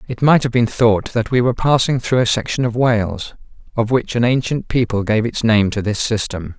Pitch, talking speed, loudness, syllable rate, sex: 115 Hz, 230 wpm, -17 LUFS, 5.2 syllables/s, male